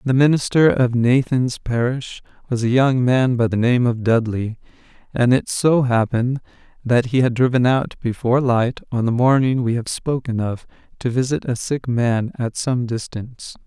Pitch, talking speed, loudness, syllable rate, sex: 125 Hz, 175 wpm, -19 LUFS, 4.7 syllables/s, male